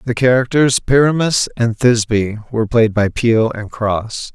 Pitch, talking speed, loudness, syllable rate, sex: 115 Hz, 150 wpm, -15 LUFS, 4.8 syllables/s, male